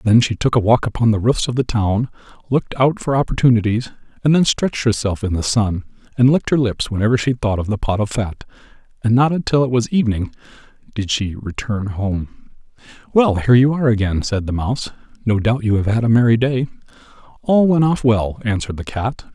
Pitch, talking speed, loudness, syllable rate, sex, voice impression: 115 Hz, 210 wpm, -18 LUFS, 5.9 syllables/s, male, very masculine, middle-aged, thick, slightly tensed, very powerful, slightly dark, very soft, very muffled, fluent, raspy, slightly cool, intellectual, slightly refreshing, sincere, calm, very mature, friendly, reassuring, very unique, elegant, wild, sweet, lively, very kind, modest